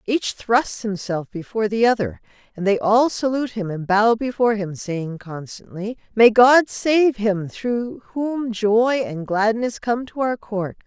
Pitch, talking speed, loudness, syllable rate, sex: 220 Hz, 165 wpm, -20 LUFS, 4.0 syllables/s, female